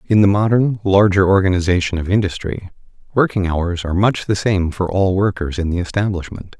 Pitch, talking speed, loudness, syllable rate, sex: 95 Hz, 175 wpm, -17 LUFS, 5.5 syllables/s, male